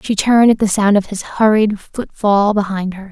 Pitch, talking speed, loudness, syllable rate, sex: 205 Hz, 230 wpm, -14 LUFS, 5.0 syllables/s, female